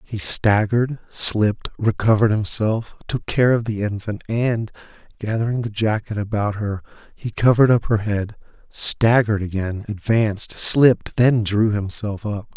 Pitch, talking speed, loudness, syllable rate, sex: 110 Hz, 140 wpm, -20 LUFS, 4.6 syllables/s, male